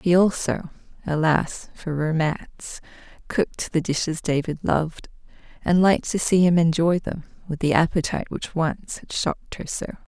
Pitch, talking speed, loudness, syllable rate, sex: 165 Hz, 140 wpm, -23 LUFS, 4.9 syllables/s, female